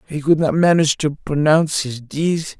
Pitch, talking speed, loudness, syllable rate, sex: 155 Hz, 185 wpm, -17 LUFS, 5.1 syllables/s, male